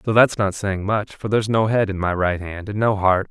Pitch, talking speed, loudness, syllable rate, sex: 100 Hz, 290 wpm, -20 LUFS, 5.4 syllables/s, male